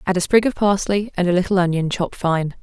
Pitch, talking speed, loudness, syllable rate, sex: 185 Hz, 250 wpm, -19 LUFS, 6.2 syllables/s, female